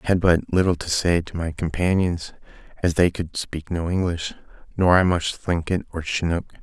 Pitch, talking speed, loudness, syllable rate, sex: 85 Hz, 190 wpm, -22 LUFS, 4.9 syllables/s, male